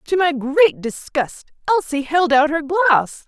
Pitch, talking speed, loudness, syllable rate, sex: 310 Hz, 165 wpm, -18 LUFS, 3.7 syllables/s, female